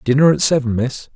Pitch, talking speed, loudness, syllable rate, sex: 130 Hz, 210 wpm, -16 LUFS, 5.8 syllables/s, male